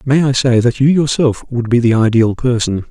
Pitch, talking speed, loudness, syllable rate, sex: 125 Hz, 225 wpm, -13 LUFS, 5.1 syllables/s, male